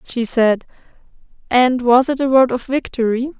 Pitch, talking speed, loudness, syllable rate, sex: 250 Hz, 160 wpm, -16 LUFS, 4.6 syllables/s, female